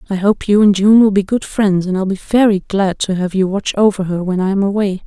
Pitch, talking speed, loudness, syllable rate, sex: 195 Hz, 270 wpm, -14 LUFS, 5.4 syllables/s, female